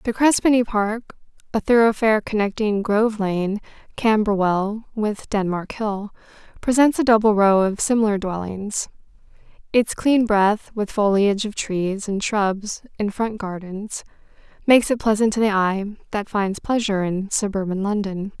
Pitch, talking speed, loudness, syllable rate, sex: 210 Hz, 140 wpm, -21 LUFS, 4.6 syllables/s, female